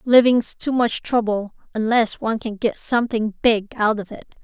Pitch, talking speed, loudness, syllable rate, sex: 225 Hz, 175 wpm, -20 LUFS, 4.8 syllables/s, female